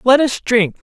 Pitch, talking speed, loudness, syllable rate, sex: 240 Hz, 195 wpm, -15 LUFS, 4.4 syllables/s, female